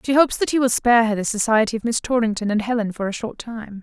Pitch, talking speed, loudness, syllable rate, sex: 225 Hz, 285 wpm, -20 LUFS, 6.7 syllables/s, female